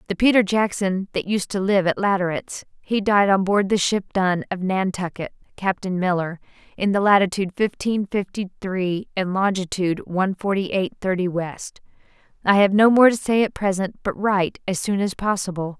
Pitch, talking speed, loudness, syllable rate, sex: 190 Hz, 180 wpm, -21 LUFS, 5.1 syllables/s, female